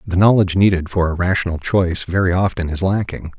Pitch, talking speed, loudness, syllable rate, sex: 90 Hz, 195 wpm, -17 LUFS, 6.2 syllables/s, male